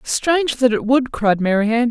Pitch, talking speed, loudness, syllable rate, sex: 240 Hz, 190 wpm, -17 LUFS, 5.0 syllables/s, female